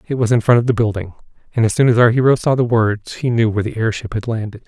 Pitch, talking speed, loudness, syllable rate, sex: 115 Hz, 295 wpm, -16 LUFS, 6.8 syllables/s, male